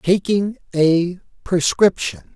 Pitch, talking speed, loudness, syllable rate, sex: 175 Hz, 75 wpm, -18 LUFS, 3.3 syllables/s, male